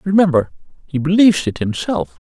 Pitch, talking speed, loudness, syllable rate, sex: 160 Hz, 130 wpm, -16 LUFS, 5.7 syllables/s, male